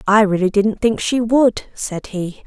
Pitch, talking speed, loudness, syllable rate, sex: 210 Hz, 195 wpm, -17 LUFS, 3.9 syllables/s, female